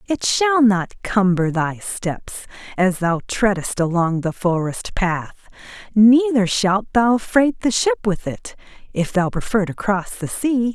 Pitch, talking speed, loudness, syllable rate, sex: 200 Hz, 155 wpm, -19 LUFS, 3.8 syllables/s, female